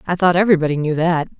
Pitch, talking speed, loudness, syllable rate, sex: 170 Hz, 215 wpm, -16 LUFS, 7.6 syllables/s, female